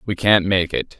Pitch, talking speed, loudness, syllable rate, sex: 95 Hz, 240 wpm, -17 LUFS, 4.6 syllables/s, male